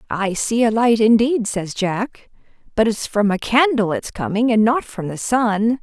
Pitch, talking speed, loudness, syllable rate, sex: 220 Hz, 195 wpm, -18 LUFS, 4.3 syllables/s, female